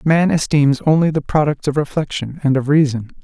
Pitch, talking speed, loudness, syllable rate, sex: 145 Hz, 185 wpm, -16 LUFS, 5.5 syllables/s, male